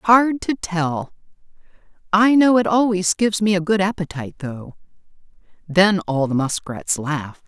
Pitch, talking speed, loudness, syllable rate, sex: 185 Hz, 145 wpm, -19 LUFS, 4.6 syllables/s, female